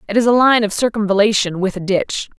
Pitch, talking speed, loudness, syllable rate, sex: 210 Hz, 225 wpm, -16 LUFS, 6.1 syllables/s, female